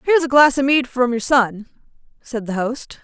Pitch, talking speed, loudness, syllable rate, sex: 255 Hz, 235 wpm, -17 LUFS, 5.4 syllables/s, female